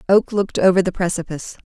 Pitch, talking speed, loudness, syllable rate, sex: 185 Hz, 180 wpm, -18 LUFS, 7.2 syllables/s, female